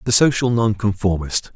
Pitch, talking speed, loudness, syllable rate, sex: 110 Hz, 115 wpm, -18 LUFS, 5.0 syllables/s, male